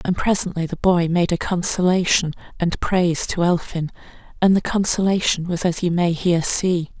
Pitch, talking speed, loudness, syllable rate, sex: 175 Hz, 170 wpm, -19 LUFS, 5.1 syllables/s, female